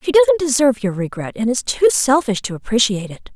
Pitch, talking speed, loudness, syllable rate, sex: 245 Hz, 215 wpm, -17 LUFS, 5.9 syllables/s, female